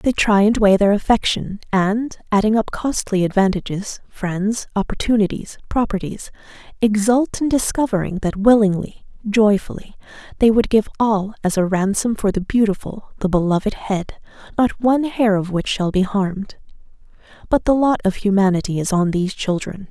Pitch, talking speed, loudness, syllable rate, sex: 205 Hz, 150 wpm, -18 LUFS, 5.0 syllables/s, female